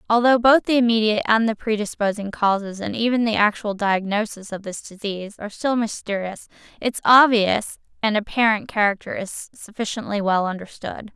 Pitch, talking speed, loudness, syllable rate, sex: 215 Hz, 150 wpm, -21 LUFS, 5.4 syllables/s, female